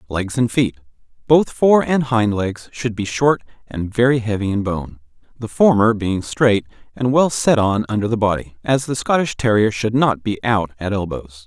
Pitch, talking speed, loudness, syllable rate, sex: 110 Hz, 190 wpm, -18 LUFS, 4.7 syllables/s, male